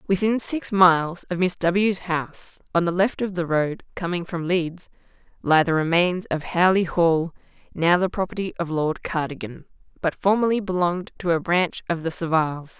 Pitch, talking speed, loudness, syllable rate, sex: 175 Hz, 165 wpm, -22 LUFS, 4.8 syllables/s, female